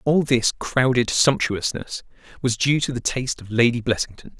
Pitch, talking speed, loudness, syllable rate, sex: 125 Hz, 165 wpm, -21 LUFS, 5.0 syllables/s, male